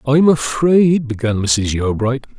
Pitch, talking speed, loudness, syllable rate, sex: 130 Hz, 150 wpm, -15 LUFS, 4.2 syllables/s, male